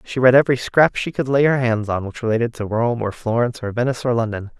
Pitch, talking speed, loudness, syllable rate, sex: 120 Hz, 260 wpm, -19 LUFS, 6.5 syllables/s, male